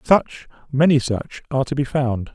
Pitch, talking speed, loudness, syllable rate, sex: 130 Hz, 180 wpm, -20 LUFS, 4.6 syllables/s, male